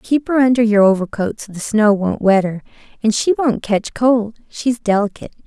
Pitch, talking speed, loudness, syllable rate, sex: 220 Hz, 195 wpm, -16 LUFS, 5.1 syllables/s, female